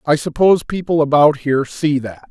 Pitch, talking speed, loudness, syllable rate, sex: 150 Hz, 180 wpm, -16 LUFS, 5.5 syllables/s, male